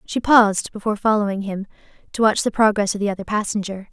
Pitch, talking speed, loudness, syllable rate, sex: 205 Hz, 200 wpm, -19 LUFS, 6.7 syllables/s, female